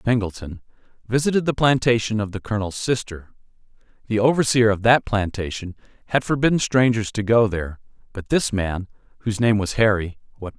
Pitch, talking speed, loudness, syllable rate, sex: 110 Hz, 170 wpm, -21 LUFS, 5.8 syllables/s, male